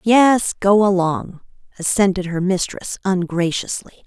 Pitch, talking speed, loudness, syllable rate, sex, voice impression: 190 Hz, 105 wpm, -18 LUFS, 4.2 syllables/s, female, feminine, adult-like, slightly powerful, clear, slightly lively, slightly intense